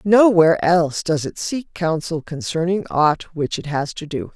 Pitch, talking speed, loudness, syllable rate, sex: 165 Hz, 180 wpm, -19 LUFS, 4.6 syllables/s, female